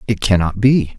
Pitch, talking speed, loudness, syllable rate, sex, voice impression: 105 Hz, 185 wpm, -15 LUFS, 4.8 syllables/s, male, masculine, adult-like, tensed, powerful, clear, fluent, intellectual, calm, friendly, reassuring, wild, lively, kind, slightly modest